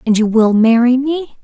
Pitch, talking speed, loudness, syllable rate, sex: 245 Hz, 210 wpm, -12 LUFS, 4.7 syllables/s, female